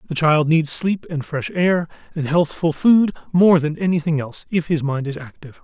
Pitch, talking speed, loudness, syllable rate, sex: 160 Hz, 200 wpm, -19 LUFS, 5.1 syllables/s, male